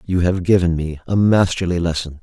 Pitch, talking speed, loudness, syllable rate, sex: 90 Hz, 190 wpm, -18 LUFS, 5.5 syllables/s, male